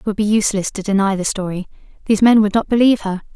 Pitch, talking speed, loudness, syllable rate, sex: 205 Hz, 250 wpm, -16 LUFS, 7.4 syllables/s, female